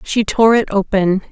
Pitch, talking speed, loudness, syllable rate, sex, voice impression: 210 Hz, 180 wpm, -14 LUFS, 4.4 syllables/s, female, feminine, adult-like, tensed, slightly powerful, soft, clear, intellectual, calm, elegant, lively, slightly sharp